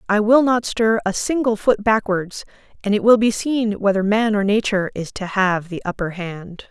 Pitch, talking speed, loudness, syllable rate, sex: 210 Hz, 205 wpm, -19 LUFS, 4.9 syllables/s, female